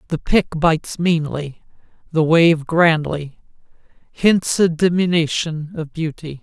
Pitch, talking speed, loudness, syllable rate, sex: 160 Hz, 110 wpm, -18 LUFS, 4.1 syllables/s, male